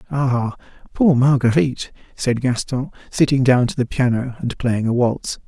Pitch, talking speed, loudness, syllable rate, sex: 125 Hz, 155 wpm, -19 LUFS, 4.6 syllables/s, male